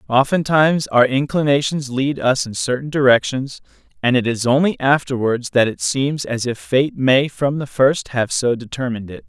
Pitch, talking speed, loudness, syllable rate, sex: 130 Hz, 175 wpm, -18 LUFS, 4.8 syllables/s, male